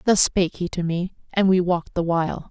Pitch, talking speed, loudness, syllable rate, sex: 180 Hz, 240 wpm, -22 LUFS, 6.1 syllables/s, female